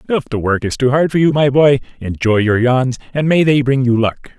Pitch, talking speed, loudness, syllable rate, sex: 130 Hz, 260 wpm, -14 LUFS, 5.2 syllables/s, male